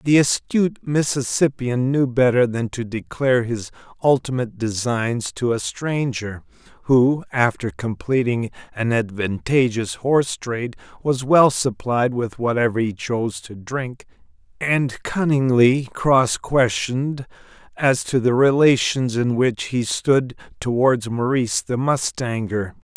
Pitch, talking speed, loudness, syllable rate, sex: 125 Hz, 120 wpm, -20 LUFS, 4.1 syllables/s, male